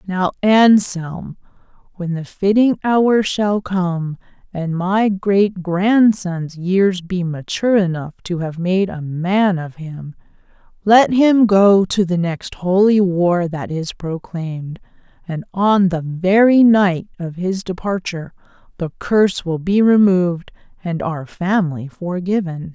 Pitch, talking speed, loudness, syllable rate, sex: 185 Hz, 135 wpm, -17 LUFS, 3.7 syllables/s, female